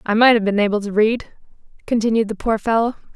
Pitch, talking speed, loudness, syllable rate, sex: 220 Hz, 210 wpm, -18 LUFS, 6.4 syllables/s, female